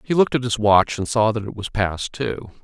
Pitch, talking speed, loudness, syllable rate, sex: 115 Hz, 275 wpm, -20 LUFS, 5.5 syllables/s, male